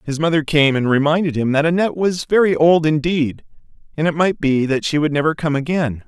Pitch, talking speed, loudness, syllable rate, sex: 155 Hz, 215 wpm, -17 LUFS, 5.7 syllables/s, male